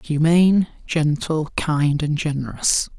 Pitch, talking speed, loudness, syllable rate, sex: 155 Hz, 100 wpm, -20 LUFS, 3.8 syllables/s, male